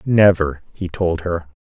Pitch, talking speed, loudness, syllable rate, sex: 85 Hz, 150 wpm, -18 LUFS, 3.9 syllables/s, male